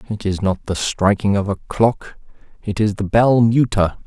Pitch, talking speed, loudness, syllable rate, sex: 105 Hz, 190 wpm, -18 LUFS, 4.5 syllables/s, male